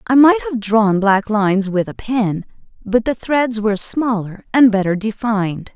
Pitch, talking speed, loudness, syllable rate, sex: 220 Hz, 175 wpm, -16 LUFS, 4.4 syllables/s, female